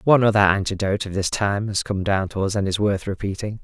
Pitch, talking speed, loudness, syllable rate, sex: 100 Hz, 250 wpm, -21 LUFS, 6.2 syllables/s, male